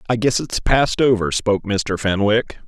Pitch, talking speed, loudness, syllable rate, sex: 110 Hz, 180 wpm, -18 LUFS, 5.0 syllables/s, male